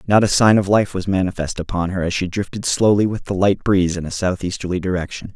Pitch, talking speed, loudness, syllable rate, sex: 95 Hz, 235 wpm, -19 LUFS, 6.2 syllables/s, male